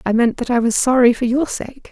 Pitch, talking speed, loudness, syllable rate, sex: 245 Hz, 280 wpm, -16 LUFS, 5.6 syllables/s, female